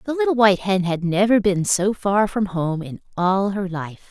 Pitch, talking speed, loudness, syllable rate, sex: 195 Hz, 220 wpm, -20 LUFS, 4.7 syllables/s, female